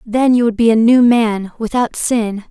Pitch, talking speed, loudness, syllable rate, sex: 230 Hz, 215 wpm, -14 LUFS, 4.3 syllables/s, female